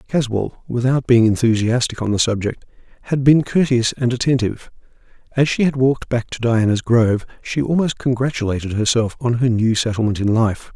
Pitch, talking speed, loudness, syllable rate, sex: 120 Hz, 165 wpm, -18 LUFS, 5.5 syllables/s, male